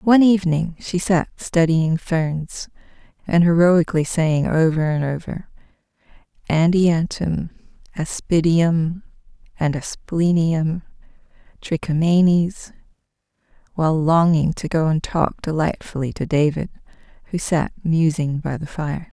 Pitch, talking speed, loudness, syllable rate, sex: 165 Hz, 100 wpm, -19 LUFS, 4.2 syllables/s, female